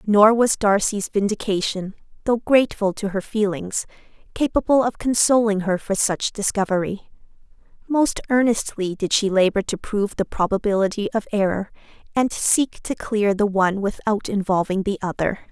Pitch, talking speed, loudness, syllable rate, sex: 205 Hz, 145 wpm, -21 LUFS, 4.9 syllables/s, female